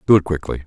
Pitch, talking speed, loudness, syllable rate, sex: 85 Hz, 270 wpm, -19 LUFS, 8.2 syllables/s, male